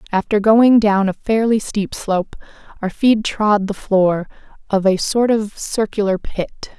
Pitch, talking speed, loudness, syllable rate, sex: 205 Hz, 160 wpm, -17 LUFS, 4.1 syllables/s, female